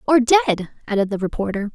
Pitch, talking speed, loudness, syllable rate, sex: 225 Hz, 170 wpm, -20 LUFS, 6.1 syllables/s, female